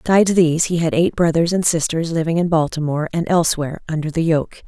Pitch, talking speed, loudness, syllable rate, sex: 165 Hz, 205 wpm, -18 LUFS, 6.6 syllables/s, female